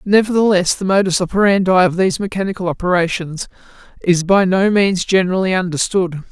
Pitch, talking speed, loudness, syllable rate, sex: 185 Hz, 135 wpm, -15 LUFS, 5.9 syllables/s, female